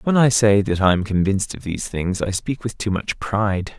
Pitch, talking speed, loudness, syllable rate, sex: 100 Hz, 255 wpm, -20 LUFS, 5.4 syllables/s, male